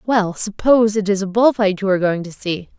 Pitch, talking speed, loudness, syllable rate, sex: 200 Hz, 260 wpm, -17 LUFS, 5.8 syllables/s, female